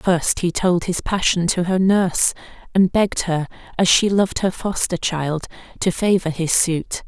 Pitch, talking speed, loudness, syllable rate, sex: 180 Hz, 180 wpm, -19 LUFS, 4.6 syllables/s, female